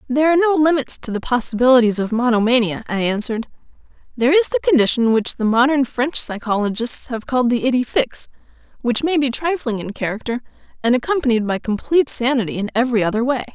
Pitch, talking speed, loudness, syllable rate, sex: 250 Hz, 175 wpm, -18 LUFS, 6.5 syllables/s, female